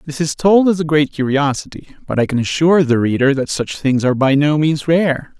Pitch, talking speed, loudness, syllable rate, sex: 145 Hz, 235 wpm, -15 LUFS, 5.6 syllables/s, male